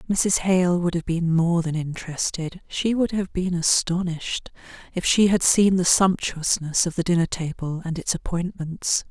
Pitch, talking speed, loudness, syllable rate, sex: 175 Hz, 165 wpm, -22 LUFS, 4.6 syllables/s, female